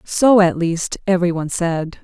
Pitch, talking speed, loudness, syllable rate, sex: 180 Hz, 175 wpm, -17 LUFS, 4.9 syllables/s, female